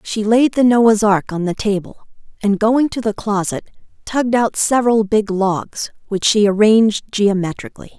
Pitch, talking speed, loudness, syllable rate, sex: 210 Hz, 165 wpm, -16 LUFS, 4.8 syllables/s, female